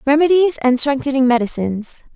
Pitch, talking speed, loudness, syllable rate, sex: 270 Hz, 110 wpm, -16 LUFS, 5.9 syllables/s, female